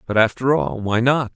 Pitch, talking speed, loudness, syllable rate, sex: 115 Hz, 220 wpm, -19 LUFS, 5.0 syllables/s, male